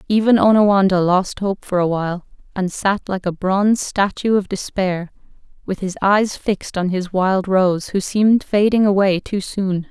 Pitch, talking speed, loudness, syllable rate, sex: 195 Hz, 175 wpm, -18 LUFS, 4.7 syllables/s, female